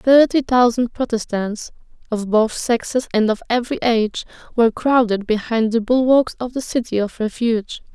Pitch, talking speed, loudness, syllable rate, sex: 235 Hz, 150 wpm, -18 LUFS, 5.1 syllables/s, female